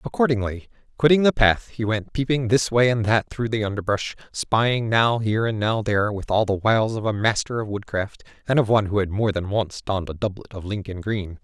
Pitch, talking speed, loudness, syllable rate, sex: 110 Hz, 225 wpm, -22 LUFS, 5.7 syllables/s, male